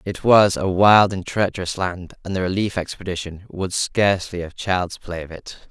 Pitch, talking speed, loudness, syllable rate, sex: 95 Hz, 190 wpm, -20 LUFS, 4.8 syllables/s, male